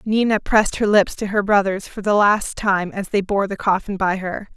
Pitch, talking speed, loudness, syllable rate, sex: 200 Hz, 235 wpm, -19 LUFS, 5.0 syllables/s, female